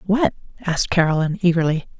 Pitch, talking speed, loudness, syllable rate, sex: 175 Hz, 120 wpm, -19 LUFS, 6.9 syllables/s, female